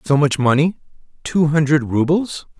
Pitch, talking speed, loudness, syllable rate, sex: 150 Hz, 115 wpm, -17 LUFS, 4.6 syllables/s, male